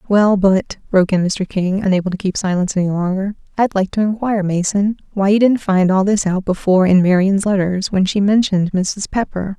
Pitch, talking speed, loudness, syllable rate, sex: 195 Hz, 205 wpm, -16 LUFS, 5.7 syllables/s, female